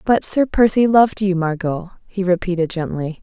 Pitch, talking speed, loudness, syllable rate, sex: 190 Hz, 170 wpm, -18 LUFS, 5.0 syllables/s, female